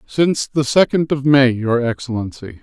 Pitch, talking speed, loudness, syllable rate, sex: 130 Hz, 160 wpm, -16 LUFS, 5.0 syllables/s, male